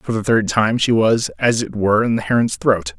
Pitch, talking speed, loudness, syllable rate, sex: 105 Hz, 260 wpm, -17 LUFS, 5.2 syllables/s, male